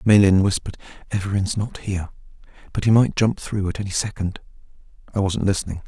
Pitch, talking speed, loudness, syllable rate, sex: 100 Hz, 165 wpm, -22 LUFS, 6.4 syllables/s, male